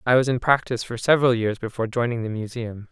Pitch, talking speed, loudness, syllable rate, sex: 120 Hz, 225 wpm, -22 LUFS, 6.8 syllables/s, male